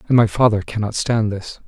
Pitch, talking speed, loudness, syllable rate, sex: 110 Hz, 215 wpm, -18 LUFS, 5.5 syllables/s, male